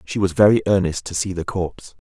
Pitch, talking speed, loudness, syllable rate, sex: 95 Hz, 230 wpm, -19 LUFS, 6.0 syllables/s, male